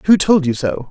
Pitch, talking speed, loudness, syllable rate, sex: 155 Hz, 265 wpm, -15 LUFS, 5.3 syllables/s, male